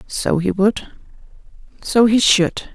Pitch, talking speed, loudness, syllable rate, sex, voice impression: 205 Hz, 130 wpm, -16 LUFS, 3.5 syllables/s, female, feminine, adult-like, relaxed, weak, soft, slightly muffled, intellectual, calm, slightly friendly, reassuring, slightly kind, slightly modest